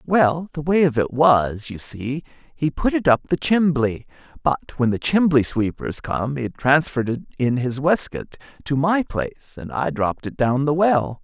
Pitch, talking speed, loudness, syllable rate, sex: 140 Hz, 190 wpm, -21 LUFS, 4.4 syllables/s, male